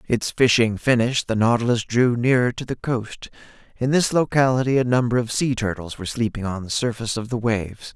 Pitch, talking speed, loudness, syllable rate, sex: 120 Hz, 195 wpm, -21 LUFS, 5.7 syllables/s, male